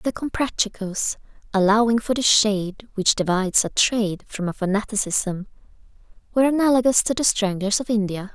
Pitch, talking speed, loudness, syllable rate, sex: 215 Hz, 145 wpm, -21 LUFS, 5.5 syllables/s, female